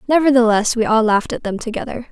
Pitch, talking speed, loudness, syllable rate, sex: 230 Hz, 200 wpm, -16 LUFS, 6.7 syllables/s, female